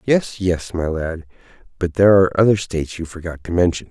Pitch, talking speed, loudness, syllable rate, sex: 90 Hz, 200 wpm, -19 LUFS, 5.9 syllables/s, male